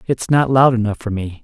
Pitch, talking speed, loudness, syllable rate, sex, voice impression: 120 Hz, 250 wpm, -16 LUFS, 5.4 syllables/s, male, masculine, adult-like, slightly soft, cool, slightly intellectual, calm, kind